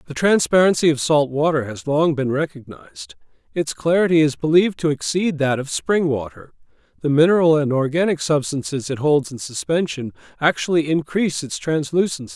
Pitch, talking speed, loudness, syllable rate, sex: 155 Hz, 155 wpm, -19 LUFS, 5.4 syllables/s, male